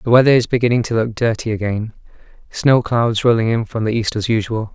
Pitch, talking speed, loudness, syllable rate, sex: 115 Hz, 215 wpm, -17 LUFS, 5.9 syllables/s, male